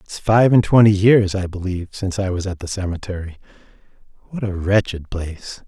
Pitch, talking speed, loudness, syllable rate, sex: 95 Hz, 180 wpm, -18 LUFS, 5.6 syllables/s, male